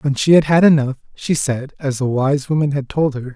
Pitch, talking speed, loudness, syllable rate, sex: 140 Hz, 270 wpm, -17 LUFS, 5.6 syllables/s, male